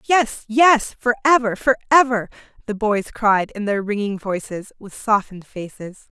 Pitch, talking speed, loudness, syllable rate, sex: 220 Hz, 155 wpm, -18 LUFS, 4.6 syllables/s, female